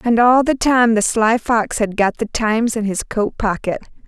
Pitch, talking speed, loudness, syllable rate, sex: 225 Hz, 220 wpm, -17 LUFS, 4.6 syllables/s, female